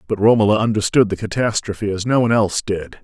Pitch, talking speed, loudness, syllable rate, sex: 105 Hz, 200 wpm, -18 LUFS, 6.8 syllables/s, male